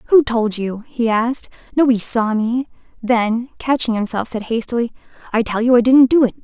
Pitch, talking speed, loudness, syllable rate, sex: 235 Hz, 185 wpm, -17 LUFS, 5.4 syllables/s, female